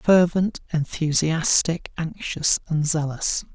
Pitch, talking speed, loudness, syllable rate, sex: 160 Hz, 85 wpm, -22 LUFS, 3.5 syllables/s, male